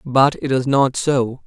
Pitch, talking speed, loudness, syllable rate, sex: 135 Hz, 205 wpm, -17 LUFS, 3.7 syllables/s, male